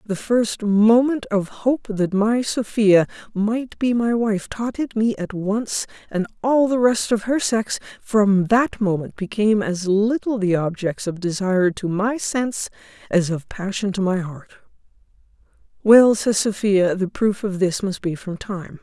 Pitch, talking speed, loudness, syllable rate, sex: 210 Hz, 170 wpm, -20 LUFS, 4.1 syllables/s, female